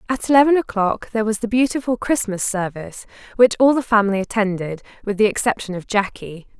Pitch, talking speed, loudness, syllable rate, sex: 215 Hz, 175 wpm, -19 LUFS, 6.1 syllables/s, female